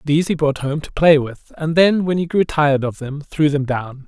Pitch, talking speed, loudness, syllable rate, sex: 150 Hz, 265 wpm, -18 LUFS, 5.1 syllables/s, male